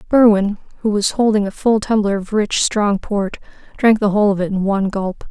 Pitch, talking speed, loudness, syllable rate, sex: 205 Hz, 215 wpm, -17 LUFS, 5.4 syllables/s, female